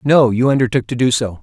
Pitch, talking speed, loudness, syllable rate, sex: 125 Hz, 210 wpm, -15 LUFS, 6.1 syllables/s, male